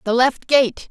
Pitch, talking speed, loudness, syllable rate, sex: 250 Hz, 200 wpm, -17 LUFS, 3.8 syllables/s, male